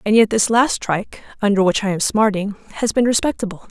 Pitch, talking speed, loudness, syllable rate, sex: 210 Hz, 210 wpm, -18 LUFS, 5.5 syllables/s, female